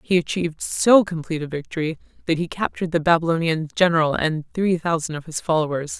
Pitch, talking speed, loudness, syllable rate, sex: 165 Hz, 180 wpm, -21 LUFS, 6.1 syllables/s, female